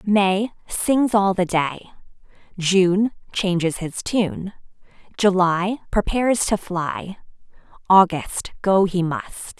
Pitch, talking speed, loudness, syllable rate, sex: 190 Hz, 80 wpm, -20 LUFS, 3.5 syllables/s, female